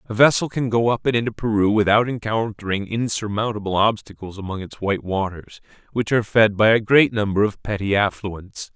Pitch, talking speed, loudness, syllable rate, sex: 105 Hz, 180 wpm, -20 LUFS, 5.5 syllables/s, male